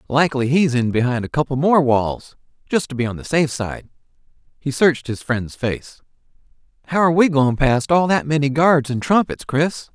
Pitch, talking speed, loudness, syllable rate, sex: 140 Hz, 195 wpm, -18 LUFS, 5.2 syllables/s, male